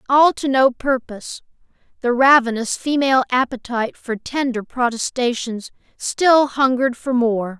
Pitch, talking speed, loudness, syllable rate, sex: 250 Hz, 120 wpm, -18 LUFS, 4.6 syllables/s, female